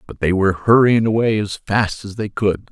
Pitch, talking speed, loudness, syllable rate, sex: 105 Hz, 220 wpm, -17 LUFS, 5.1 syllables/s, male